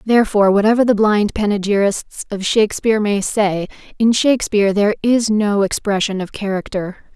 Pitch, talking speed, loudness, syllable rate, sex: 210 Hz, 145 wpm, -16 LUFS, 5.5 syllables/s, female